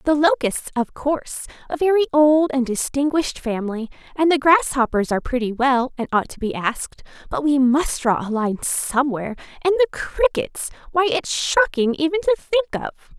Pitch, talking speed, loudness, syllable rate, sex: 285 Hz, 165 wpm, -20 LUFS, 5.4 syllables/s, female